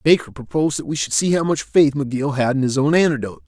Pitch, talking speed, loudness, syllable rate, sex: 140 Hz, 260 wpm, -19 LUFS, 6.6 syllables/s, male